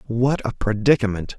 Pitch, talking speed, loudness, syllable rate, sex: 115 Hz, 130 wpm, -21 LUFS, 5.0 syllables/s, male